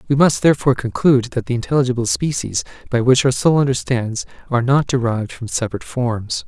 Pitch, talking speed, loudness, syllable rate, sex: 125 Hz, 175 wpm, -18 LUFS, 6.4 syllables/s, male